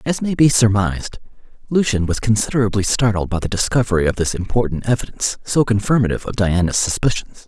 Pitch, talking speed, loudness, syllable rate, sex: 110 Hz, 160 wpm, -18 LUFS, 6.3 syllables/s, male